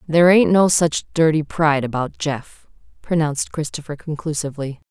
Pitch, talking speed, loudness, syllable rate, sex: 155 Hz, 135 wpm, -19 LUFS, 5.4 syllables/s, female